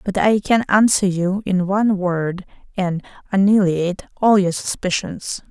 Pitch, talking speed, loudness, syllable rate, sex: 190 Hz, 140 wpm, -18 LUFS, 4.5 syllables/s, female